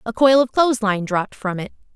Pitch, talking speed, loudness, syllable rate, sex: 225 Hz, 245 wpm, -18 LUFS, 6.1 syllables/s, female